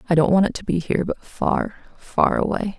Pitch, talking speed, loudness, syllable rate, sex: 185 Hz, 235 wpm, -21 LUFS, 5.5 syllables/s, female